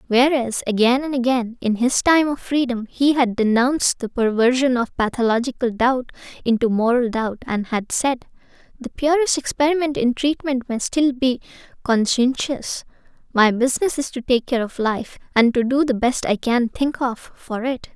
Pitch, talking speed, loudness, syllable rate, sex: 250 Hz, 165 wpm, -20 LUFS, 4.8 syllables/s, female